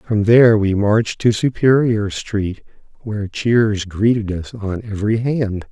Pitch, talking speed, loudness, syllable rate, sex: 110 Hz, 145 wpm, -17 LUFS, 4.2 syllables/s, male